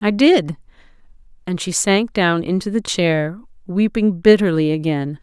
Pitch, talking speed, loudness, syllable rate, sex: 190 Hz, 140 wpm, -17 LUFS, 4.3 syllables/s, female